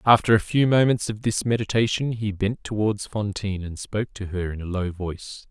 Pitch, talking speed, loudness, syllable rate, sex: 105 Hz, 205 wpm, -24 LUFS, 5.5 syllables/s, male